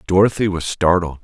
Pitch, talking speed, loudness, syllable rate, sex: 90 Hz, 145 wpm, -17 LUFS, 5.6 syllables/s, male